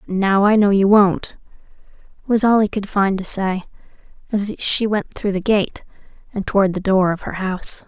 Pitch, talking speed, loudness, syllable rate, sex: 200 Hz, 190 wpm, -18 LUFS, 4.8 syllables/s, female